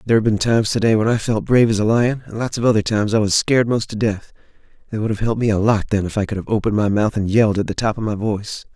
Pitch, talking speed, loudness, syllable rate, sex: 110 Hz, 315 wpm, -18 LUFS, 7.4 syllables/s, male